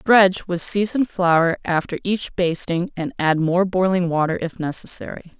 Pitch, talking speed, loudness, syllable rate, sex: 180 Hz, 155 wpm, -20 LUFS, 4.8 syllables/s, female